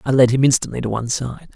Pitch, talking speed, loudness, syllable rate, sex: 125 Hz, 270 wpm, -18 LUFS, 7.1 syllables/s, male